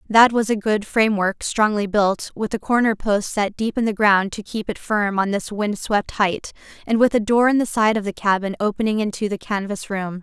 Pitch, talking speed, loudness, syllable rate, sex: 210 Hz, 230 wpm, -20 LUFS, 5.1 syllables/s, female